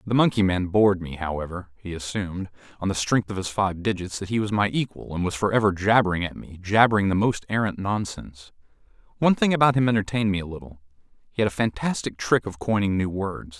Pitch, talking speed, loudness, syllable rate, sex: 100 Hz, 210 wpm, -24 LUFS, 6.2 syllables/s, male